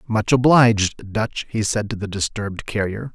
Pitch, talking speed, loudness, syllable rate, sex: 110 Hz, 170 wpm, -20 LUFS, 4.8 syllables/s, male